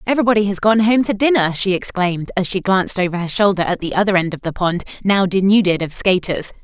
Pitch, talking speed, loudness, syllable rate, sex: 190 Hz, 225 wpm, -17 LUFS, 6.3 syllables/s, female